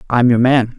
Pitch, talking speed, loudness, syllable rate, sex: 120 Hz, 230 wpm, -13 LUFS, 5.0 syllables/s, male